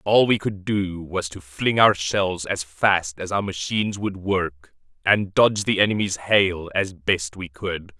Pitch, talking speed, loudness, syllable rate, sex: 95 Hz, 190 wpm, -22 LUFS, 4.0 syllables/s, male